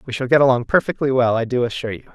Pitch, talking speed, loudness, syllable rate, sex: 125 Hz, 280 wpm, -18 LUFS, 7.5 syllables/s, male